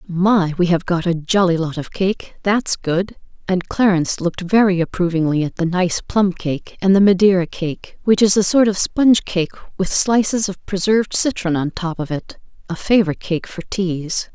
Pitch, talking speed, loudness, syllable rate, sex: 185 Hz, 190 wpm, -18 LUFS, 4.9 syllables/s, female